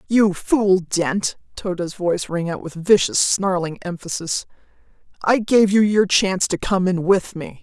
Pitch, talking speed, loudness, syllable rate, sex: 185 Hz, 165 wpm, -19 LUFS, 4.3 syllables/s, female